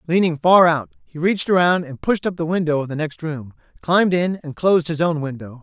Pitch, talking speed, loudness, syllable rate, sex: 165 Hz, 235 wpm, -19 LUFS, 5.7 syllables/s, male